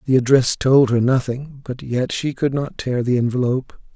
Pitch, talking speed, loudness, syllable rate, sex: 130 Hz, 195 wpm, -19 LUFS, 5.0 syllables/s, male